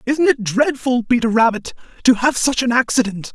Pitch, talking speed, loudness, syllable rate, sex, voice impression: 235 Hz, 180 wpm, -17 LUFS, 5.1 syllables/s, male, very masculine, very adult-like, middle-aged, very thick, slightly tensed, powerful, slightly dark, soft, clear, fluent, very cool, very intellectual, slightly refreshing, very sincere, very calm, very mature, very friendly, very reassuring, very unique, elegant, wild, sweet, slightly lively, very kind, slightly modest